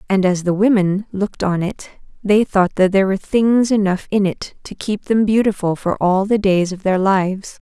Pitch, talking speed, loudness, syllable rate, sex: 195 Hz, 210 wpm, -17 LUFS, 5.0 syllables/s, female